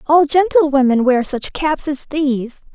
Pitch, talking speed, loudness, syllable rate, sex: 285 Hz, 155 wpm, -16 LUFS, 4.5 syllables/s, female